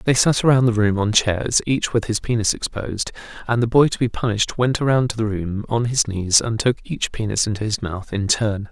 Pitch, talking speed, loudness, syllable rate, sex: 110 Hz, 235 wpm, -20 LUFS, 5.3 syllables/s, male